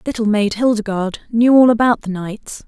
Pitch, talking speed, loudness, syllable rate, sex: 220 Hz, 180 wpm, -15 LUFS, 5.4 syllables/s, female